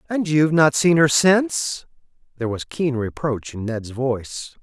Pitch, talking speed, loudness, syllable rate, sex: 140 Hz, 170 wpm, -20 LUFS, 4.7 syllables/s, male